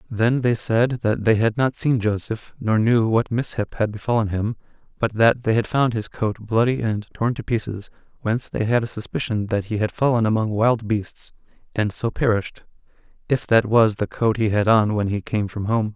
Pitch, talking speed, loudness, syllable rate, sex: 110 Hz, 210 wpm, -21 LUFS, 5.0 syllables/s, male